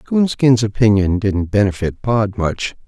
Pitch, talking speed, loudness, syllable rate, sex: 110 Hz, 125 wpm, -16 LUFS, 4.1 syllables/s, male